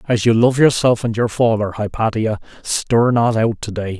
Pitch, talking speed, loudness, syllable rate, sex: 115 Hz, 195 wpm, -17 LUFS, 4.7 syllables/s, male